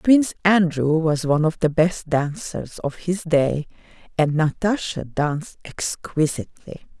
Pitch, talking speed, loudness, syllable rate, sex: 160 Hz, 130 wpm, -21 LUFS, 4.2 syllables/s, female